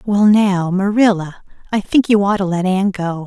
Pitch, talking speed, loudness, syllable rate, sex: 195 Hz, 200 wpm, -15 LUFS, 4.9 syllables/s, female